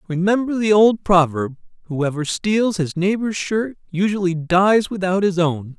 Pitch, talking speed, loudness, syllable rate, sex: 185 Hz, 145 wpm, -19 LUFS, 4.2 syllables/s, male